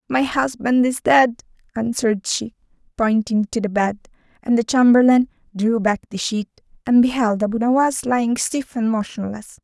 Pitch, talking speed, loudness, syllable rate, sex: 230 Hz, 155 wpm, -19 LUFS, 4.9 syllables/s, female